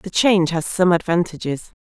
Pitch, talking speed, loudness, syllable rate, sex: 175 Hz, 165 wpm, -19 LUFS, 5.3 syllables/s, female